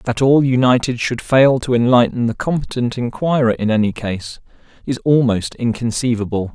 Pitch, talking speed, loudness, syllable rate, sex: 120 Hz, 145 wpm, -17 LUFS, 4.9 syllables/s, male